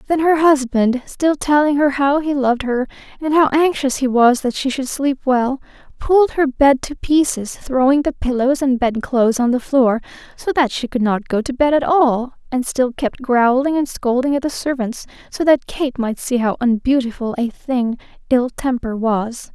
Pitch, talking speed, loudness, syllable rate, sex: 265 Hz, 195 wpm, -17 LUFS, 4.7 syllables/s, female